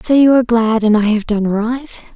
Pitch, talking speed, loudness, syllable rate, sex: 230 Hz, 250 wpm, -14 LUFS, 5.1 syllables/s, female